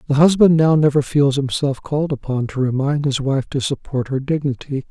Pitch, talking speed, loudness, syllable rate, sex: 140 Hz, 195 wpm, -18 LUFS, 5.3 syllables/s, male